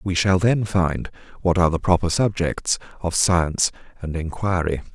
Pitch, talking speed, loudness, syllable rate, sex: 90 Hz, 160 wpm, -21 LUFS, 4.8 syllables/s, male